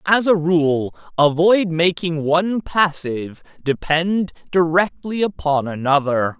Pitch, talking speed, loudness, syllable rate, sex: 165 Hz, 105 wpm, -18 LUFS, 3.9 syllables/s, male